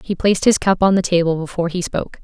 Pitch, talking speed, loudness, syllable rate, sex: 180 Hz, 270 wpm, -17 LUFS, 7.1 syllables/s, female